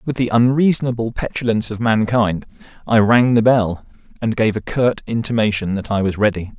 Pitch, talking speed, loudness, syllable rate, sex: 115 Hz, 175 wpm, -17 LUFS, 5.4 syllables/s, male